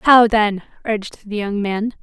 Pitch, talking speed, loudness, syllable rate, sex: 210 Hz, 180 wpm, -18 LUFS, 4.2 syllables/s, female